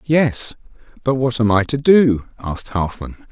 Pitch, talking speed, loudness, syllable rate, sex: 125 Hz, 165 wpm, -18 LUFS, 4.3 syllables/s, male